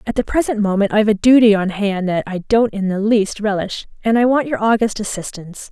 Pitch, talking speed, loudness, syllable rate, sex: 210 Hz, 230 wpm, -16 LUFS, 5.8 syllables/s, female